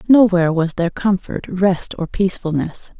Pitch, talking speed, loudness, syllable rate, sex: 185 Hz, 140 wpm, -18 LUFS, 5.0 syllables/s, female